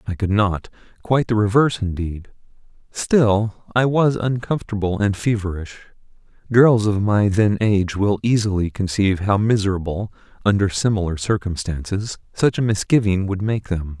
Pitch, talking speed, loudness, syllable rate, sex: 105 Hz, 130 wpm, -19 LUFS, 5.0 syllables/s, male